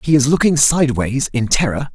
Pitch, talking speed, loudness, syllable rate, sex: 135 Hz, 185 wpm, -15 LUFS, 5.5 syllables/s, male